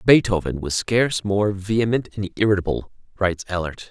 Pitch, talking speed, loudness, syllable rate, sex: 100 Hz, 140 wpm, -22 LUFS, 5.7 syllables/s, male